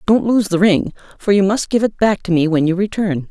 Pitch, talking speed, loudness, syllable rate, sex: 195 Hz, 270 wpm, -16 LUFS, 5.4 syllables/s, female